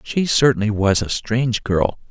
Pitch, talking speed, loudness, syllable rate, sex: 115 Hz, 170 wpm, -18 LUFS, 4.7 syllables/s, male